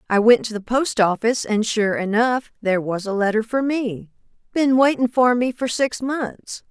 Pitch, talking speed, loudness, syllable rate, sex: 230 Hz, 190 wpm, -20 LUFS, 4.7 syllables/s, female